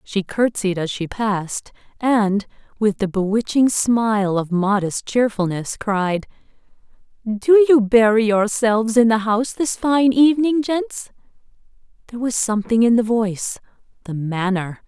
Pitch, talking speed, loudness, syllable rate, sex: 220 Hz, 130 wpm, -18 LUFS, 4.5 syllables/s, female